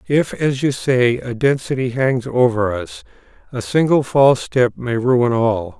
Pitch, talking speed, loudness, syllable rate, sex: 125 Hz, 165 wpm, -17 LUFS, 4.1 syllables/s, male